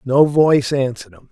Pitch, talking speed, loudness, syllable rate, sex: 135 Hz, 180 wpm, -16 LUFS, 5.8 syllables/s, male